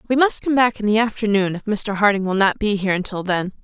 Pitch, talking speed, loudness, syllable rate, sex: 210 Hz, 265 wpm, -19 LUFS, 6.2 syllables/s, female